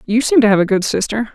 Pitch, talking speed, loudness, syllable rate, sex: 220 Hz, 310 wpm, -15 LUFS, 6.6 syllables/s, female